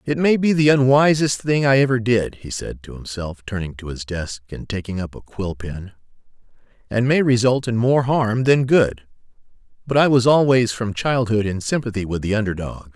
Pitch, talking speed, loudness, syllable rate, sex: 115 Hz, 200 wpm, -19 LUFS, 5.0 syllables/s, male